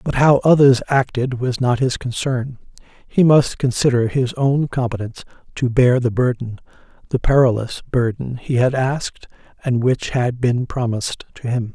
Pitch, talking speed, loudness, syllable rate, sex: 125 Hz, 155 wpm, -18 LUFS, 4.7 syllables/s, male